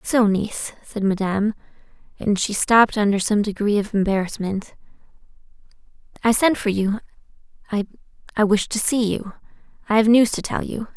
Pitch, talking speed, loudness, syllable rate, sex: 210 Hz, 130 wpm, -21 LUFS, 5.4 syllables/s, female